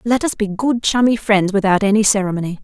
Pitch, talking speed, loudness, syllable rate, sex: 210 Hz, 205 wpm, -16 LUFS, 6.0 syllables/s, female